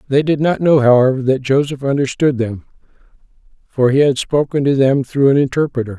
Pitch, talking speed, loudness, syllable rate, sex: 135 Hz, 180 wpm, -15 LUFS, 5.6 syllables/s, male